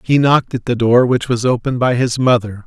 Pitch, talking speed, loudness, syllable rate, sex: 120 Hz, 250 wpm, -15 LUFS, 5.8 syllables/s, male